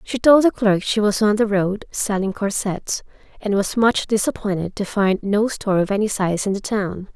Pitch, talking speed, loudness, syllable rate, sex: 205 Hz, 210 wpm, -20 LUFS, 4.9 syllables/s, female